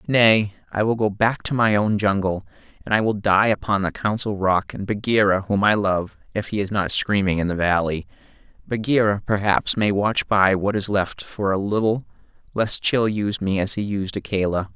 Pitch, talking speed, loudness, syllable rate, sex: 100 Hz, 195 wpm, -21 LUFS, 5.0 syllables/s, male